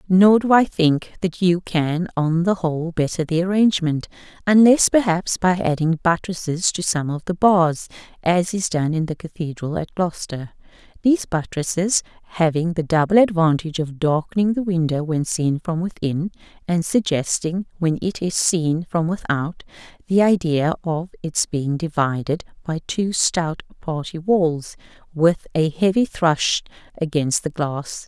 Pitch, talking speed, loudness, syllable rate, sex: 170 Hz, 150 wpm, -20 LUFS, 4.4 syllables/s, female